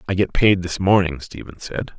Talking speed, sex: 210 wpm, male